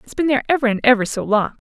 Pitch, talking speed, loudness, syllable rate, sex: 240 Hz, 290 wpm, -18 LUFS, 7.8 syllables/s, female